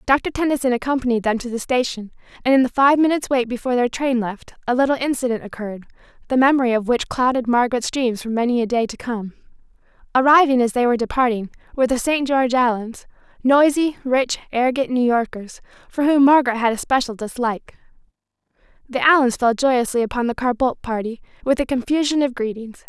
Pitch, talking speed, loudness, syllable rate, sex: 250 Hz, 185 wpm, -19 LUFS, 6.2 syllables/s, female